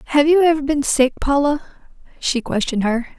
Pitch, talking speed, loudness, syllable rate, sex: 280 Hz, 170 wpm, -18 LUFS, 6.0 syllables/s, female